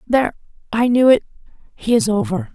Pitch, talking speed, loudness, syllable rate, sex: 235 Hz, 120 wpm, -17 LUFS, 5.9 syllables/s, female